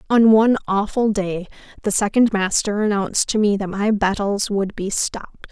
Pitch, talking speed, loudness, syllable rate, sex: 205 Hz, 175 wpm, -19 LUFS, 5.0 syllables/s, female